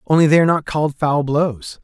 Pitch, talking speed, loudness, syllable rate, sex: 150 Hz, 230 wpm, -17 LUFS, 5.9 syllables/s, male